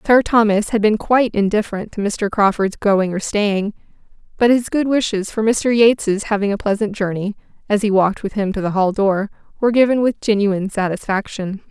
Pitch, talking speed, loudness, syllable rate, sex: 210 Hz, 190 wpm, -17 LUFS, 5.5 syllables/s, female